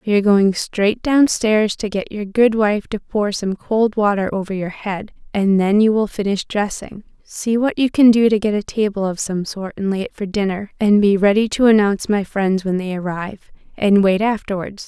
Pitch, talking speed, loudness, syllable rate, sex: 205 Hz, 215 wpm, -18 LUFS, 4.9 syllables/s, female